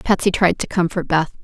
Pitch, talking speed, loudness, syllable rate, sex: 180 Hz, 210 wpm, -18 LUFS, 5.5 syllables/s, female